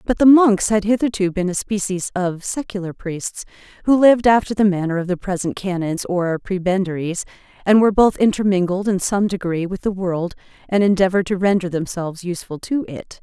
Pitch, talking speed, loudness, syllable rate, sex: 190 Hz, 180 wpm, -19 LUFS, 5.5 syllables/s, female